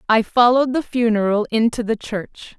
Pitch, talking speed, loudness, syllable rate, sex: 225 Hz, 165 wpm, -18 LUFS, 5.1 syllables/s, female